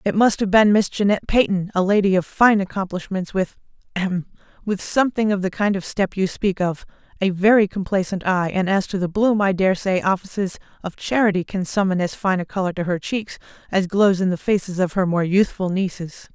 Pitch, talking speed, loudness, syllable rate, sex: 190 Hz, 200 wpm, -20 LUFS, 5.5 syllables/s, female